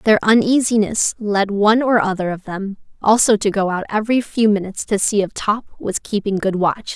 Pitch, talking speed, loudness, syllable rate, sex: 205 Hz, 200 wpm, -17 LUFS, 5.2 syllables/s, female